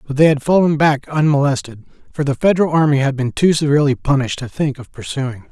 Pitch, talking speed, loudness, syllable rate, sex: 140 Hz, 205 wpm, -16 LUFS, 6.4 syllables/s, male